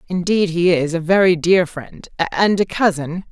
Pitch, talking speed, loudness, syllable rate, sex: 175 Hz, 165 wpm, -17 LUFS, 4.5 syllables/s, female